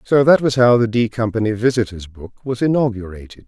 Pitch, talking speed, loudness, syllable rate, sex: 115 Hz, 190 wpm, -17 LUFS, 5.6 syllables/s, male